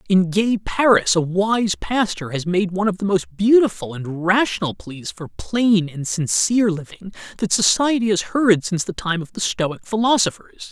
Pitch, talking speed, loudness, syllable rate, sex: 190 Hz, 180 wpm, -19 LUFS, 4.7 syllables/s, male